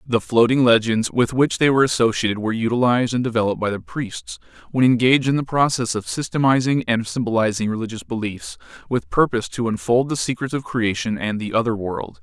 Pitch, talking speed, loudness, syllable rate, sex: 120 Hz, 180 wpm, -20 LUFS, 6.1 syllables/s, male